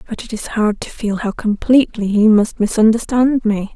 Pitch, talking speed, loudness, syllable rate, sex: 220 Hz, 190 wpm, -16 LUFS, 5.0 syllables/s, female